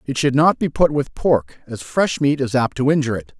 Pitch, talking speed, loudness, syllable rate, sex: 135 Hz, 265 wpm, -18 LUFS, 5.3 syllables/s, male